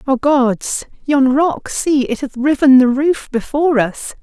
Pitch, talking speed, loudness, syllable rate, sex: 270 Hz, 155 wpm, -15 LUFS, 3.9 syllables/s, female